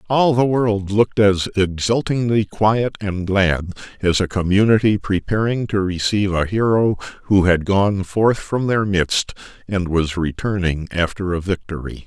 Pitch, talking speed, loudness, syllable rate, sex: 100 Hz, 150 wpm, -18 LUFS, 4.4 syllables/s, male